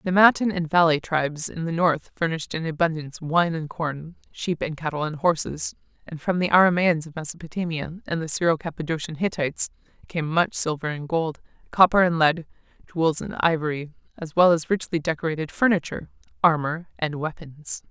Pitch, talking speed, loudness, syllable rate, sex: 165 Hz, 170 wpm, -23 LUFS, 5.7 syllables/s, female